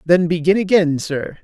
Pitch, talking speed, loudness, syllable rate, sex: 170 Hz, 165 wpm, -17 LUFS, 4.6 syllables/s, male